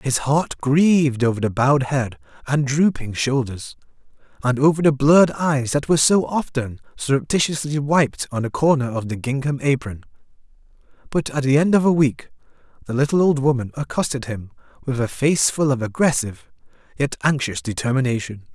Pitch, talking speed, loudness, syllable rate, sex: 135 Hz, 160 wpm, -20 LUFS, 5.3 syllables/s, male